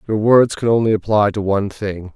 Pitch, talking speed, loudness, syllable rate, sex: 105 Hz, 225 wpm, -16 LUFS, 5.5 syllables/s, male